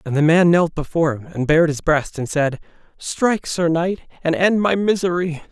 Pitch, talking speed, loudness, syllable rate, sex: 165 Hz, 205 wpm, -18 LUFS, 5.4 syllables/s, male